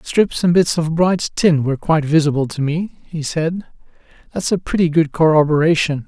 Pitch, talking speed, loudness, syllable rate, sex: 160 Hz, 180 wpm, -17 LUFS, 5.3 syllables/s, male